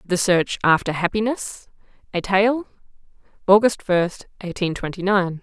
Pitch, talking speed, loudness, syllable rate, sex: 195 Hz, 120 wpm, -20 LUFS, 4.3 syllables/s, female